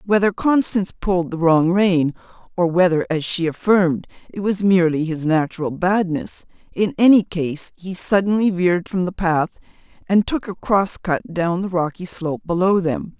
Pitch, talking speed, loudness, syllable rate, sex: 180 Hz, 170 wpm, -19 LUFS, 4.9 syllables/s, female